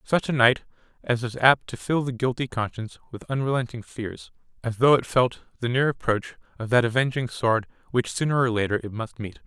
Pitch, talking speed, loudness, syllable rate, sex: 120 Hz, 205 wpm, -24 LUFS, 5.4 syllables/s, male